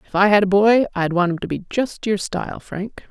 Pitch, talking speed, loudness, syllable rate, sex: 200 Hz, 270 wpm, -19 LUFS, 5.5 syllables/s, female